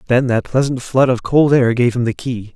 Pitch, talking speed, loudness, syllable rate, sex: 125 Hz, 260 wpm, -16 LUFS, 5.1 syllables/s, male